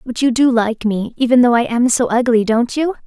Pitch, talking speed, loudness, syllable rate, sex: 240 Hz, 255 wpm, -15 LUFS, 5.3 syllables/s, female